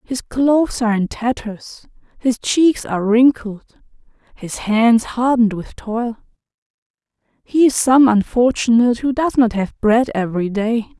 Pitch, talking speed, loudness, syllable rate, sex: 235 Hz, 135 wpm, -16 LUFS, 4.5 syllables/s, female